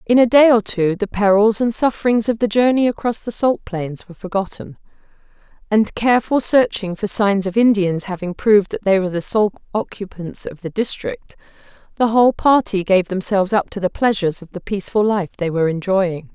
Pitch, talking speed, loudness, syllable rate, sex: 205 Hz, 190 wpm, -17 LUFS, 5.6 syllables/s, female